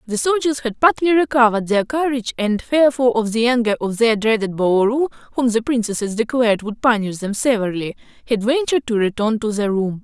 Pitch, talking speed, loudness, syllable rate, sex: 230 Hz, 185 wpm, -18 LUFS, 5.9 syllables/s, female